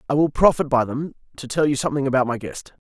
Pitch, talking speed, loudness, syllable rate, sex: 140 Hz, 250 wpm, -21 LUFS, 6.7 syllables/s, male